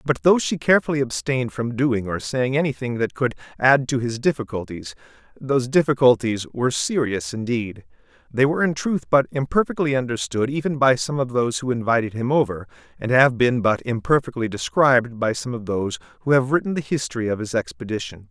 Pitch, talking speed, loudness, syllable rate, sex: 125 Hz, 180 wpm, -21 LUFS, 5.8 syllables/s, male